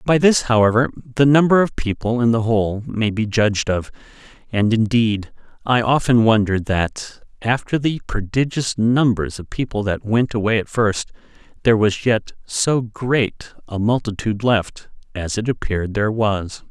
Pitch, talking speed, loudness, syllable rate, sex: 115 Hz, 160 wpm, -19 LUFS, 4.7 syllables/s, male